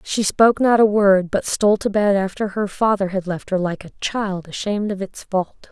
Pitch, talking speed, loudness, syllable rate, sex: 200 Hz, 230 wpm, -19 LUFS, 5.1 syllables/s, female